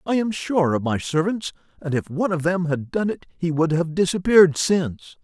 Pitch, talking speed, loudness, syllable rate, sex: 170 Hz, 220 wpm, -21 LUFS, 5.3 syllables/s, male